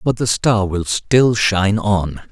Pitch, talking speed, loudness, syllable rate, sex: 105 Hz, 180 wpm, -16 LUFS, 3.6 syllables/s, male